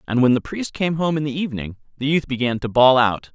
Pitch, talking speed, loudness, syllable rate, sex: 135 Hz, 270 wpm, -20 LUFS, 6.0 syllables/s, male